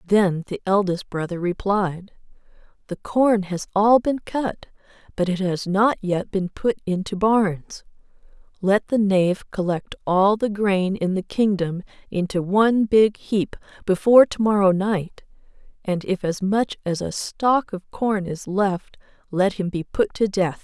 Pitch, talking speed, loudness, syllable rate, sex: 195 Hz, 160 wpm, -21 LUFS, 4.1 syllables/s, female